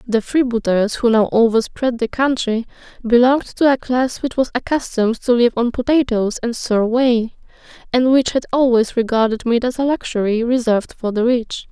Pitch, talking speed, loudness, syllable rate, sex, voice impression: 240 Hz, 175 wpm, -17 LUFS, 5.1 syllables/s, female, gender-neutral, slightly adult-like, soft, slightly fluent, friendly, slightly unique, kind